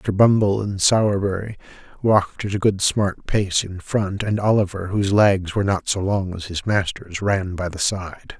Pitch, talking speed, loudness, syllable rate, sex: 100 Hz, 195 wpm, -20 LUFS, 4.7 syllables/s, male